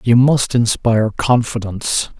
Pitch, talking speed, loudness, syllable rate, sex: 115 Hz, 110 wpm, -16 LUFS, 4.5 syllables/s, male